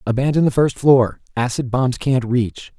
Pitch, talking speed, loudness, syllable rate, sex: 125 Hz, 170 wpm, -18 LUFS, 4.4 syllables/s, male